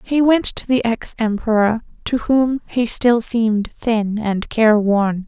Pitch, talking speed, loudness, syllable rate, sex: 225 Hz, 160 wpm, -17 LUFS, 3.9 syllables/s, female